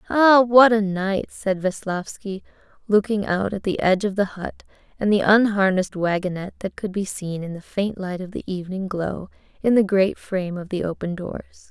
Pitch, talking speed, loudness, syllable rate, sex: 195 Hz, 195 wpm, -21 LUFS, 5.1 syllables/s, female